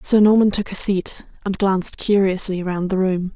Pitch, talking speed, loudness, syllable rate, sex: 190 Hz, 195 wpm, -18 LUFS, 4.9 syllables/s, female